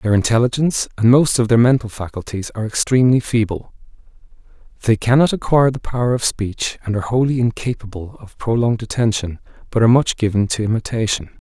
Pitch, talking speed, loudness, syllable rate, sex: 115 Hz, 160 wpm, -17 LUFS, 6.3 syllables/s, male